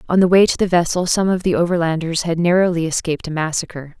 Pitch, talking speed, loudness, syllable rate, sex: 170 Hz, 225 wpm, -17 LUFS, 6.6 syllables/s, female